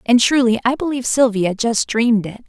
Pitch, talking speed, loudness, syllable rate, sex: 235 Hz, 195 wpm, -17 LUFS, 5.6 syllables/s, female